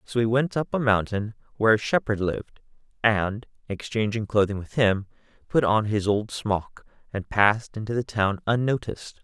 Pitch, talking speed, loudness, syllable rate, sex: 110 Hz, 170 wpm, -24 LUFS, 5.1 syllables/s, male